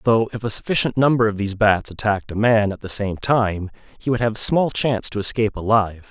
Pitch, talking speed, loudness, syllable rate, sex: 110 Hz, 225 wpm, -20 LUFS, 6.0 syllables/s, male